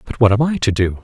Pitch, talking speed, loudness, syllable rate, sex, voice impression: 115 Hz, 350 wpm, -16 LUFS, 6.5 syllables/s, male, masculine, adult-like, tensed, powerful, bright, clear, slightly fluent, cool, intellectual, calm, slightly mature, friendly, reassuring, wild, lively, slightly light